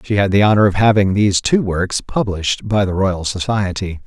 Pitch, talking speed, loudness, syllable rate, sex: 100 Hz, 205 wpm, -16 LUFS, 5.3 syllables/s, male